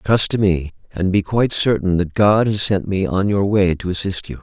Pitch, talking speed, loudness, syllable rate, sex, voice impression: 95 Hz, 245 wpm, -18 LUFS, 5.2 syllables/s, male, adult-like, slightly relaxed, powerful, hard, clear, raspy, cool, intellectual, calm, slightly mature, reassuring, wild, slightly lively, kind, slightly sharp, modest